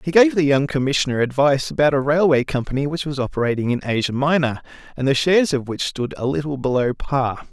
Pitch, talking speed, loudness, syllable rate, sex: 140 Hz, 205 wpm, -19 LUFS, 6.2 syllables/s, male